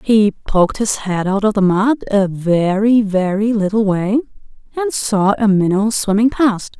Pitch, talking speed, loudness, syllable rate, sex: 210 Hz, 170 wpm, -15 LUFS, 4.3 syllables/s, female